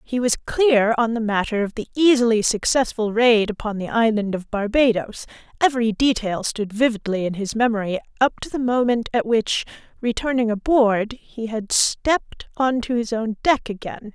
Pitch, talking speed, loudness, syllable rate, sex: 230 Hz, 170 wpm, -20 LUFS, 4.9 syllables/s, female